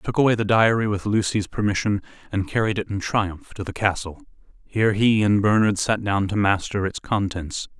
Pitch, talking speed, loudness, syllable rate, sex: 100 Hz, 200 wpm, -22 LUFS, 5.6 syllables/s, male